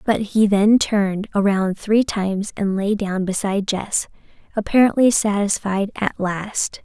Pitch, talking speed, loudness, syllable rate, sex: 205 Hz, 140 wpm, -19 LUFS, 4.3 syllables/s, female